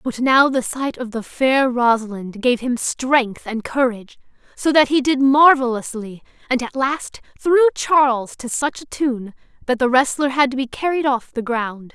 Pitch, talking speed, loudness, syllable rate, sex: 255 Hz, 185 wpm, -18 LUFS, 4.5 syllables/s, female